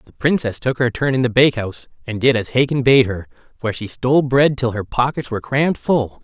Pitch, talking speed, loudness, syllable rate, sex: 125 Hz, 230 wpm, -18 LUFS, 5.9 syllables/s, male